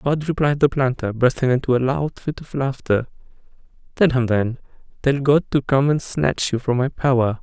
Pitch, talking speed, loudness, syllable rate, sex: 130 Hz, 185 wpm, -20 LUFS, 5.0 syllables/s, male